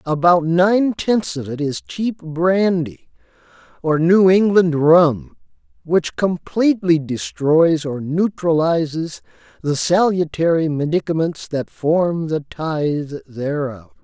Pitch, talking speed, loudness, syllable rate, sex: 165 Hz, 105 wpm, -18 LUFS, 3.6 syllables/s, male